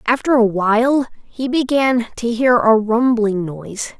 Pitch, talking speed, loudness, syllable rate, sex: 235 Hz, 150 wpm, -16 LUFS, 4.2 syllables/s, female